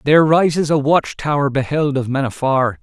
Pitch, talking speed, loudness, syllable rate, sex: 140 Hz, 170 wpm, -16 LUFS, 5.2 syllables/s, male